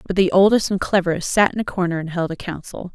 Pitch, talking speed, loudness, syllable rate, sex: 185 Hz, 265 wpm, -19 LUFS, 6.5 syllables/s, female